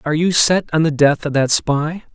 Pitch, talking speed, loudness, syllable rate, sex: 155 Hz, 250 wpm, -16 LUFS, 5.3 syllables/s, male